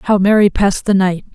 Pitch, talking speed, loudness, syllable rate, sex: 195 Hz, 225 wpm, -13 LUFS, 5.7 syllables/s, female